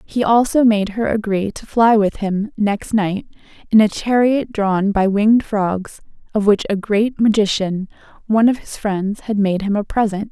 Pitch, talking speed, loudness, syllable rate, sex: 210 Hz, 185 wpm, -17 LUFS, 4.4 syllables/s, female